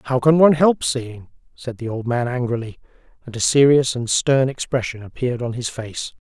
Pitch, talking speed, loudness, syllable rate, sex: 125 Hz, 190 wpm, -19 LUFS, 5.3 syllables/s, male